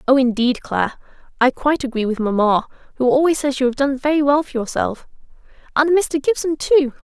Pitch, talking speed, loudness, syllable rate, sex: 270 Hz, 185 wpm, -18 LUFS, 5.7 syllables/s, female